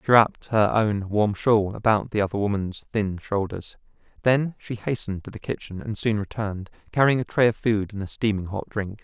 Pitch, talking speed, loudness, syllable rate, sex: 105 Hz, 205 wpm, -24 LUFS, 5.3 syllables/s, male